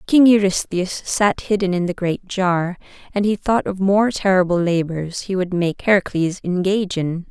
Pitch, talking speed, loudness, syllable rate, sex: 185 Hz, 175 wpm, -19 LUFS, 4.6 syllables/s, female